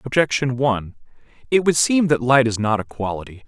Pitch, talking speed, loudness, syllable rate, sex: 130 Hz, 190 wpm, -19 LUFS, 5.7 syllables/s, male